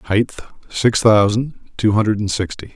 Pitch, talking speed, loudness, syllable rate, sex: 105 Hz, 130 wpm, -17 LUFS, 4.1 syllables/s, male